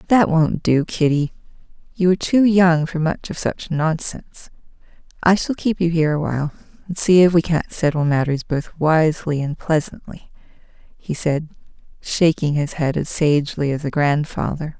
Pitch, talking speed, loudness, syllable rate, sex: 160 Hz, 165 wpm, -19 LUFS, 4.8 syllables/s, female